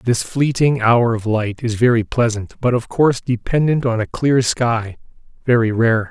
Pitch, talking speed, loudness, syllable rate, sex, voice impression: 120 Hz, 175 wpm, -17 LUFS, 4.5 syllables/s, male, masculine, middle-aged, tensed, powerful, hard, clear, intellectual, slightly mature, friendly, reassuring, wild, lively, slightly modest